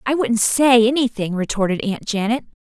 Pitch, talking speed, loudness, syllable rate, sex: 230 Hz, 155 wpm, -18 LUFS, 5.1 syllables/s, female